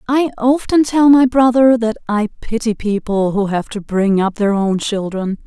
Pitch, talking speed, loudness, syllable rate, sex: 225 Hz, 185 wpm, -15 LUFS, 4.3 syllables/s, female